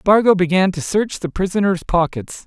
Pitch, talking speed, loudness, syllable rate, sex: 185 Hz, 170 wpm, -17 LUFS, 4.9 syllables/s, male